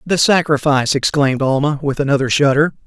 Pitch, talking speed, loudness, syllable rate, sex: 145 Hz, 145 wpm, -15 LUFS, 6.1 syllables/s, male